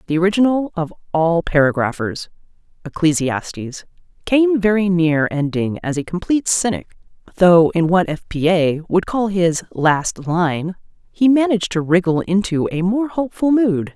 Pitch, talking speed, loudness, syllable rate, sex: 180 Hz, 135 wpm, -17 LUFS, 4.9 syllables/s, female